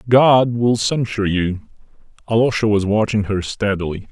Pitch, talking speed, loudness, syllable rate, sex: 110 Hz, 130 wpm, -17 LUFS, 4.9 syllables/s, male